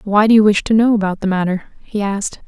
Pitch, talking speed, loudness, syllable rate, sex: 205 Hz, 265 wpm, -15 LUFS, 6.4 syllables/s, female